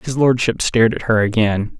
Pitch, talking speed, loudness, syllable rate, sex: 110 Hz, 200 wpm, -16 LUFS, 5.3 syllables/s, male